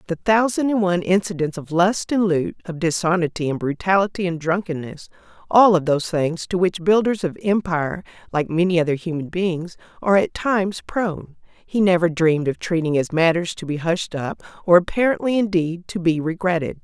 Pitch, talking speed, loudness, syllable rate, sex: 175 Hz, 170 wpm, -20 LUFS, 5.4 syllables/s, female